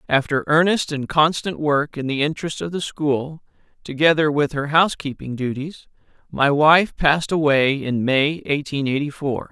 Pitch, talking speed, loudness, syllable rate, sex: 145 Hz, 160 wpm, -19 LUFS, 4.7 syllables/s, male